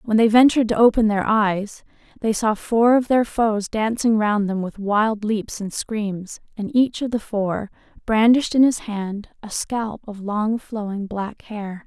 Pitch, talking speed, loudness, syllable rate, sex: 215 Hz, 185 wpm, -20 LUFS, 4.1 syllables/s, female